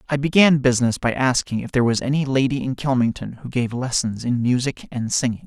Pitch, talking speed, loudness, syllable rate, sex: 130 Hz, 210 wpm, -20 LUFS, 5.9 syllables/s, male